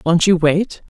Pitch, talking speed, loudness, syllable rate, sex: 175 Hz, 180 wpm, -15 LUFS, 4.0 syllables/s, female